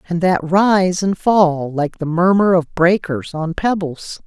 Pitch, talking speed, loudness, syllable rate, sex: 175 Hz, 170 wpm, -16 LUFS, 3.7 syllables/s, female